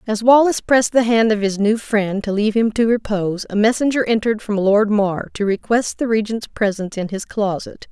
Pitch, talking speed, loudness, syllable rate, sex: 215 Hz, 210 wpm, -18 LUFS, 5.6 syllables/s, female